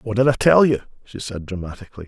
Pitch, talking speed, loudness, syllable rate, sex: 115 Hz, 230 wpm, -19 LUFS, 6.6 syllables/s, male